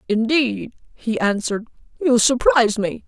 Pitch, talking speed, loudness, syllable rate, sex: 240 Hz, 115 wpm, -19 LUFS, 4.7 syllables/s, female